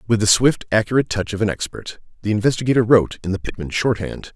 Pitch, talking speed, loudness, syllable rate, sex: 105 Hz, 205 wpm, -19 LUFS, 6.7 syllables/s, male